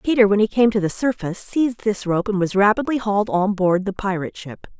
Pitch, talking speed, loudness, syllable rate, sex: 205 Hz, 240 wpm, -20 LUFS, 6.1 syllables/s, female